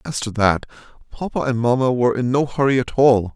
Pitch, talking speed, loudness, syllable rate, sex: 125 Hz, 215 wpm, -18 LUFS, 5.7 syllables/s, male